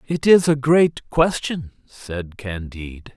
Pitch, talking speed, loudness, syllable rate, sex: 130 Hz, 135 wpm, -19 LUFS, 3.6 syllables/s, male